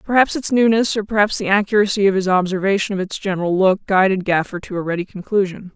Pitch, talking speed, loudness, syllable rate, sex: 195 Hz, 210 wpm, -18 LUFS, 6.4 syllables/s, female